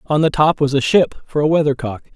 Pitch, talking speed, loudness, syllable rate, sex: 145 Hz, 250 wpm, -16 LUFS, 6.0 syllables/s, male